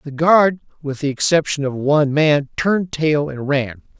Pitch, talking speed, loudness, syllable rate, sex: 145 Hz, 180 wpm, -17 LUFS, 4.6 syllables/s, male